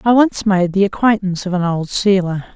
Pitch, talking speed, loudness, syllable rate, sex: 195 Hz, 210 wpm, -16 LUFS, 5.5 syllables/s, female